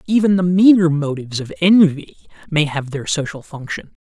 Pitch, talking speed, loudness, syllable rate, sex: 160 Hz, 165 wpm, -16 LUFS, 5.3 syllables/s, male